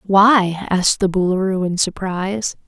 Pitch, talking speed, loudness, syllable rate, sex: 190 Hz, 135 wpm, -17 LUFS, 4.6 syllables/s, female